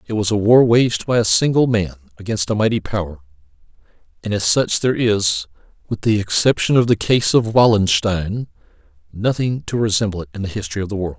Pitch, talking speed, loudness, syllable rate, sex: 105 Hz, 195 wpm, -17 LUFS, 5.8 syllables/s, male